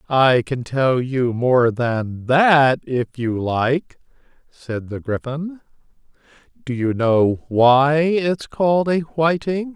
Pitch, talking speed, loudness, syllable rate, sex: 140 Hz, 130 wpm, -19 LUFS, 3.0 syllables/s, male